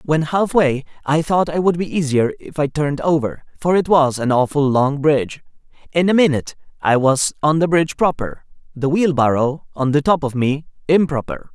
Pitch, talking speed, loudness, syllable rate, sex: 150 Hz, 190 wpm, -18 LUFS, 5.2 syllables/s, male